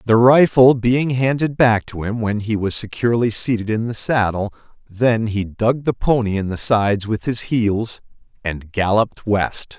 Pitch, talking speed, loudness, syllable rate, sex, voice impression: 110 Hz, 180 wpm, -18 LUFS, 4.5 syllables/s, male, very masculine, very adult-like, very middle-aged, very thick, slightly tensed, powerful, bright, soft, clear, fluent, cool, intellectual, slightly refreshing, very sincere, very calm, very mature, friendly, reassuring, slightly unique, wild, slightly sweet, lively, kind, slightly intense